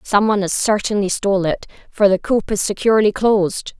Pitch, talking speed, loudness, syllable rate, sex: 205 Hz, 175 wpm, -17 LUFS, 5.8 syllables/s, female